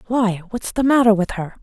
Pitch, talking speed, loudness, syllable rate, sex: 215 Hz, 220 wpm, -18 LUFS, 5.3 syllables/s, female